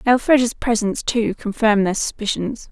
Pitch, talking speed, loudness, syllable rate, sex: 220 Hz, 130 wpm, -19 LUFS, 5.4 syllables/s, female